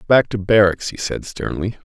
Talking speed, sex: 190 wpm, male